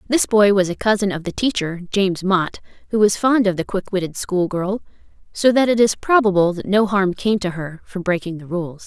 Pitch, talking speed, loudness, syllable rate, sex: 195 Hz, 230 wpm, -19 LUFS, 5.3 syllables/s, female